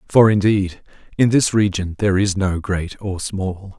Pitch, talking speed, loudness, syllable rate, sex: 100 Hz, 175 wpm, -18 LUFS, 4.4 syllables/s, male